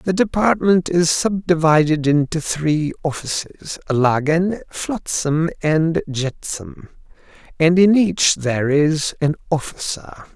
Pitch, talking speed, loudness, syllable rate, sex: 160 Hz, 95 wpm, -18 LUFS, 3.7 syllables/s, male